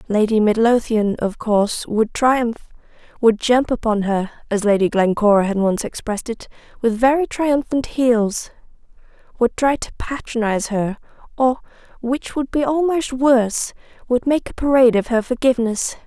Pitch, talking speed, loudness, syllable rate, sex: 235 Hz, 140 wpm, -18 LUFS, 4.9 syllables/s, female